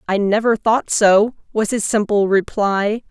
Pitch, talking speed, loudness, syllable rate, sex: 210 Hz, 155 wpm, -17 LUFS, 4.1 syllables/s, female